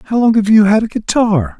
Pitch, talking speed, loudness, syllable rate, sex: 205 Hz, 265 wpm, -12 LUFS, 5.2 syllables/s, male